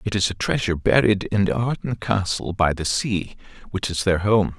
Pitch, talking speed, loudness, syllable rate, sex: 100 Hz, 195 wpm, -22 LUFS, 4.8 syllables/s, male